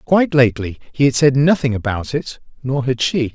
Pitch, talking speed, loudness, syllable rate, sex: 135 Hz, 180 wpm, -17 LUFS, 5.4 syllables/s, male